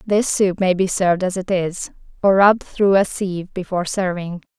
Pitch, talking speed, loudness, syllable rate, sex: 185 Hz, 195 wpm, -18 LUFS, 5.2 syllables/s, female